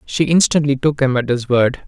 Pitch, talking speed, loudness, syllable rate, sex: 135 Hz, 225 wpm, -16 LUFS, 5.3 syllables/s, male